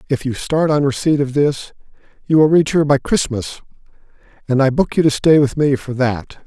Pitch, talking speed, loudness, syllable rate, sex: 140 Hz, 215 wpm, -16 LUFS, 5.4 syllables/s, male